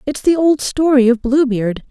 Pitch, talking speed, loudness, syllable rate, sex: 265 Hz, 190 wpm, -14 LUFS, 4.6 syllables/s, female